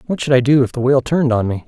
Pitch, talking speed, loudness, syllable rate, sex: 130 Hz, 360 wpm, -15 LUFS, 8.0 syllables/s, male